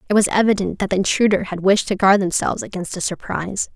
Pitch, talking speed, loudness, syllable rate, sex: 195 Hz, 225 wpm, -19 LUFS, 6.5 syllables/s, female